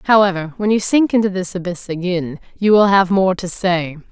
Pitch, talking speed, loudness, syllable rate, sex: 185 Hz, 205 wpm, -16 LUFS, 5.2 syllables/s, female